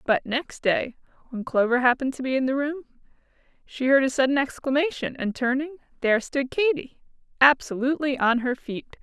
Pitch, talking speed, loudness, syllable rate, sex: 265 Hz, 165 wpm, -24 LUFS, 5.6 syllables/s, female